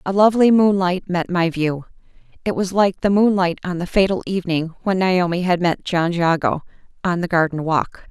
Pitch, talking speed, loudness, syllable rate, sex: 180 Hz, 185 wpm, -19 LUFS, 5.2 syllables/s, female